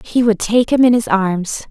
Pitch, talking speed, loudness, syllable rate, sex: 220 Hz, 245 wpm, -15 LUFS, 4.5 syllables/s, female